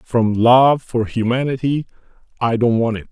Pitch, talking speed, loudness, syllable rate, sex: 120 Hz, 155 wpm, -17 LUFS, 4.6 syllables/s, male